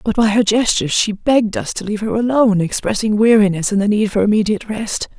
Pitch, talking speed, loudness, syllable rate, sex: 210 Hz, 220 wpm, -16 LUFS, 6.4 syllables/s, female